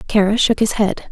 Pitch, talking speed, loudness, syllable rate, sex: 210 Hz, 215 wpm, -16 LUFS, 5.3 syllables/s, female